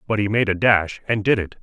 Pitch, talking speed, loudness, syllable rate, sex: 105 Hz, 295 wpm, -19 LUFS, 5.7 syllables/s, male